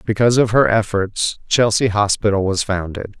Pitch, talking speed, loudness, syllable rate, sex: 105 Hz, 150 wpm, -17 LUFS, 5.1 syllables/s, male